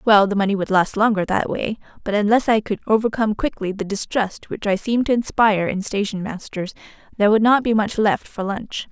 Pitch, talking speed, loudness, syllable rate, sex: 210 Hz, 215 wpm, -20 LUFS, 5.7 syllables/s, female